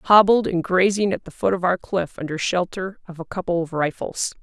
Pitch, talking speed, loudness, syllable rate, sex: 185 Hz, 215 wpm, -21 LUFS, 5.2 syllables/s, female